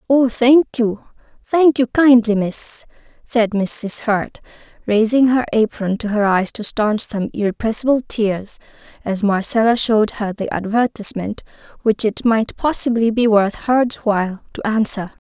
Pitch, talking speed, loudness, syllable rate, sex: 225 Hz, 145 wpm, -17 LUFS, 4.3 syllables/s, female